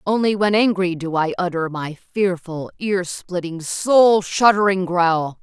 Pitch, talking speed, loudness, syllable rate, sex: 185 Hz, 145 wpm, -19 LUFS, 3.9 syllables/s, female